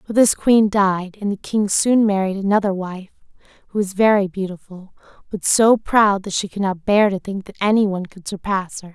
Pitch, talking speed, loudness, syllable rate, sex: 200 Hz, 210 wpm, -18 LUFS, 5.2 syllables/s, female